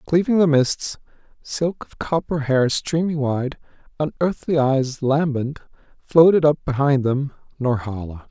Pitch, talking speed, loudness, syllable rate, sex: 140 Hz, 115 wpm, -20 LUFS, 4.1 syllables/s, male